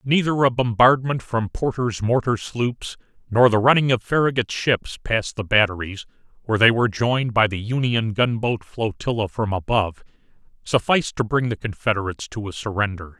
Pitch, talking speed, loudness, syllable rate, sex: 115 Hz, 160 wpm, -21 LUFS, 5.3 syllables/s, male